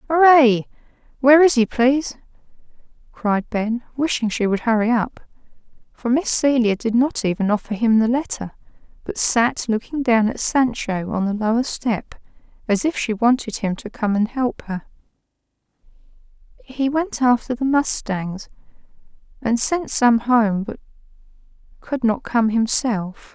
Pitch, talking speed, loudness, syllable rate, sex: 235 Hz, 145 wpm, -19 LUFS, 4.5 syllables/s, female